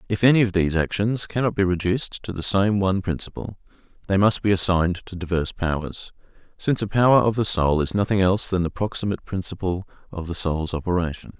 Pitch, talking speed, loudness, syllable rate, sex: 95 Hz, 195 wpm, -22 LUFS, 6.3 syllables/s, male